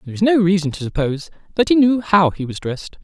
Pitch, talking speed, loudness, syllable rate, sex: 180 Hz, 255 wpm, -18 LUFS, 6.9 syllables/s, male